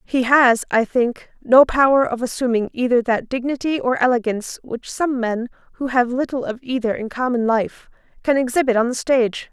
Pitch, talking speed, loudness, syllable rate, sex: 250 Hz, 185 wpm, -19 LUFS, 5.1 syllables/s, female